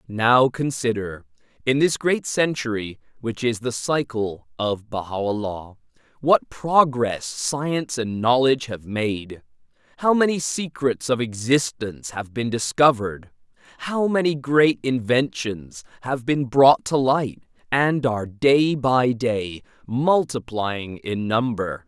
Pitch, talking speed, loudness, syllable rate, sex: 125 Hz, 120 wpm, -22 LUFS, 3.8 syllables/s, male